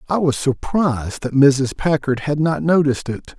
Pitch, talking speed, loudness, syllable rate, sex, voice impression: 145 Hz, 175 wpm, -18 LUFS, 4.7 syllables/s, male, very masculine, very adult-like, old, tensed, slightly weak, slightly bright, soft, muffled, slightly fluent, raspy, cool, very intellectual, sincere, calm, friendly, reassuring, unique, slightly elegant, wild, slightly sweet, slightly lively, strict, slightly modest